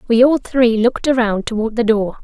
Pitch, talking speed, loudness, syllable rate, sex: 235 Hz, 215 wpm, -15 LUFS, 5.4 syllables/s, female